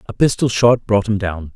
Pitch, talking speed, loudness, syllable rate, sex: 105 Hz, 230 wpm, -16 LUFS, 5.0 syllables/s, male